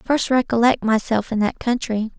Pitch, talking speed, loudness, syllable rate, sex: 230 Hz, 165 wpm, -19 LUFS, 4.9 syllables/s, female